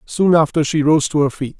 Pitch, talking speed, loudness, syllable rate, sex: 150 Hz, 265 wpm, -16 LUFS, 5.4 syllables/s, male